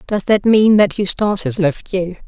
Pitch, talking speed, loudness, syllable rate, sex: 195 Hz, 210 wpm, -15 LUFS, 4.9 syllables/s, female